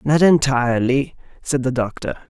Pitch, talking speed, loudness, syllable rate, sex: 135 Hz, 125 wpm, -19 LUFS, 4.6 syllables/s, male